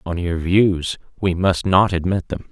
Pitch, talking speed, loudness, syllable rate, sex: 90 Hz, 190 wpm, -19 LUFS, 4.1 syllables/s, male